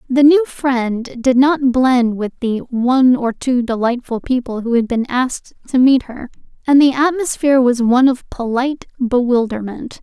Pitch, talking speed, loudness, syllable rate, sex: 250 Hz, 170 wpm, -15 LUFS, 4.7 syllables/s, female